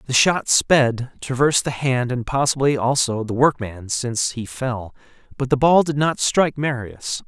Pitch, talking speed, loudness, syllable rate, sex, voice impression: 130 Hz, 175 wpm, -20 LUFS, 4.6 syllables/s, male, very masculine, very middle-aged, thick, slightly tensed, powerful, slightly bright, soft, slightly muffled, fluent, raspy, slightly cool, intellectual, slightly refreshing, slightly sincere, calm, mature, slightly friendly, slightly reassuring, unique, slightly elegant, very wild, slightly sweet, lively, kind, slightly modest